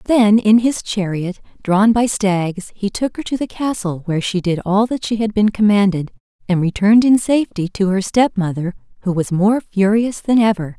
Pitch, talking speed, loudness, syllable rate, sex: 205 Hz, 195 wpm, -17 LUFS, 5.0 syllables/s, female